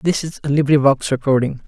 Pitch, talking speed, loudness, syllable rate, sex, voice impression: 140 Hz, 180 wpm, -17 LUFS, 6.1 syllables/s, male, masculine, slightly feminine, gender-neutral, adult-like, slightly middle-aged, slightly thick, very relaxed, weak, dark, soft, muffled, slightly halting, slightly cool, intellectual, sincere, very calm, slightly mature, slightly friendly, slightly reassuring, very unique, elegant, kind, very modest